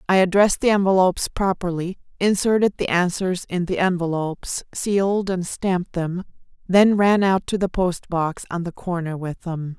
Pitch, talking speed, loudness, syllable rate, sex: 180 Hz, 165 wpm, -21 LUFS, 4.9 syllables/s, female